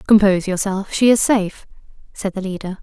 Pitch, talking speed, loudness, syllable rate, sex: 200 Hz, 170 wpm, -18 LUFS, 5.9 syllables/s, female